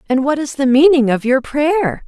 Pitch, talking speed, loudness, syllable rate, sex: 275 Hz, 230 wpm, -14 LUFS, 4.8 syllables/s, female